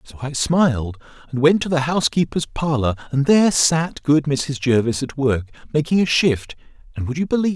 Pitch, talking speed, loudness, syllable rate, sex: 145 Hz, 200 wpm, -19 LUFS, 5.5 syllables/s, male